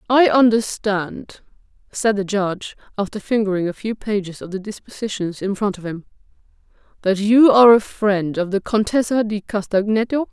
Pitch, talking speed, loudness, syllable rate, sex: 205 Hz, 155 wpm, -19 LUFS, 5.1 syllables/s, female